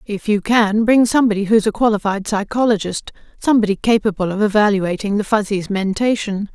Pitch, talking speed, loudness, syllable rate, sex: 210 Hz, 145 wpm, -17 LUFS, 5.7 syllables/s, female